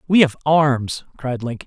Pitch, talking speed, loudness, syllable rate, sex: 135 Hz, 180 wpm, -19 LUFS, 4.4 syllables/s, male